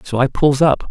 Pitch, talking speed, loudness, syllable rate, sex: 135 Hz, 265 wpm, -15 LUFS, 5.2 syllables/s, male